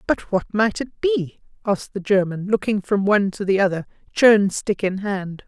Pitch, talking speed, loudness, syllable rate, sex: 200 Hz, 195 wpm, -20 LUFS, 4.9 syllables/s, female